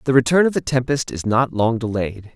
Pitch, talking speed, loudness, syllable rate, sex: 120 Hz, 230 wpm, -19 LUFS, 5.4 syllables/s, male